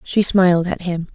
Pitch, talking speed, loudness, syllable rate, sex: 180 Hz, 210 wpm, -17 LUFS, 5.0 syllables/s, female